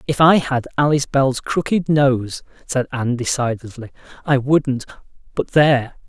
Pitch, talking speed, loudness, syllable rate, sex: 135 Hz, 130 wpm, -18 LUFS, 4.7 syllables/s, male